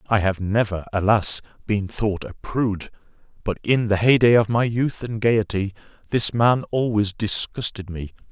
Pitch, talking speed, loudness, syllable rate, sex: 105 Hz, 160 wpm, -21 LUFS, 4.5 syllables/s, male